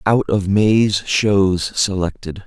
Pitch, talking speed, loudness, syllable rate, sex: 100 Hz, 120 wpm, -17 LUFS, 3.0 syllables/s, male